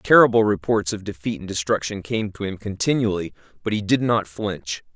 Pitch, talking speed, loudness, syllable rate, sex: 100 Hz, 180 wpm, -22 LUFS, 5.3 syllables/s, male